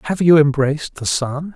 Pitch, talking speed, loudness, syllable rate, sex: 150 Hz, 195 wpm, -16 LUFS, 5.1 syllables/s, male